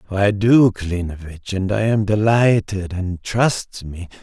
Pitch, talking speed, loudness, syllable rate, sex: 100 Hz, 140 wpm, -18 LUFS, 3.6 syllables/s, male